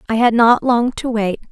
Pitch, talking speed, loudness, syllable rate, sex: 230 Hz, 240 wpm, -15 LUFS, 5.0 syllables/s, female